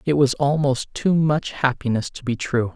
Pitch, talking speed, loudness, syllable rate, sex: 135 Hz, 195 wpm, -21 LUFS, 4.7 syllables/s, male